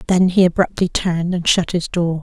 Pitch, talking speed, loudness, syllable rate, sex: 175 Hz, 215 wpm, -17 LUFS, 5.4 syllables/s, female